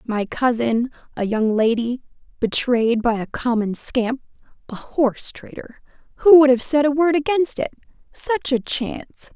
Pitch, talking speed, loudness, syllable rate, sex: 255 Hz, 140 wpm, -19 LUFS, 4.6 syllables/s, female